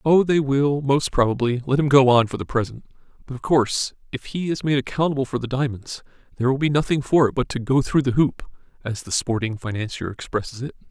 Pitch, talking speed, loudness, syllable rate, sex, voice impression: 130 Hz, 225 wpm, -21 LUFS, 5.9 syllables/s, male, very masculine, adult-like, slightly thick, slightly tensed, powerful, bright, slightly soft, clear, fluent, raspy, cool, very intellectual, very refreshing, sincere, slightly calm, mature, friendly, reassuring, very unique, slightly elegant, wild, slightly sweet, very lively, strict, slightly intense, slightly sharp